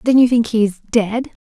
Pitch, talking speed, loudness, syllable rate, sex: 225 Hz, 170 wpm, -16 LUFS, 4.6 syllables/s, female